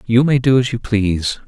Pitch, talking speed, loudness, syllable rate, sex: 115 Hz, 245 wpm, -16 LUFS, 5.3 syllables/s, male